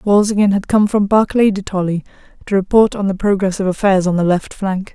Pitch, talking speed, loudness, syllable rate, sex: 195 Hz, 220 wpm, -15 LUFS, 5.6 syllables/s, female